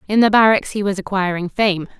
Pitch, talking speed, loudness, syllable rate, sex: 200 Hz, 210 wpm, -17 LUFS, 5.8 syllables/s, female